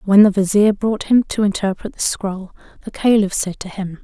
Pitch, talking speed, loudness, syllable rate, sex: 200 Hz, 210 wpm, -17 LUFS, 5.0 syllables/s, female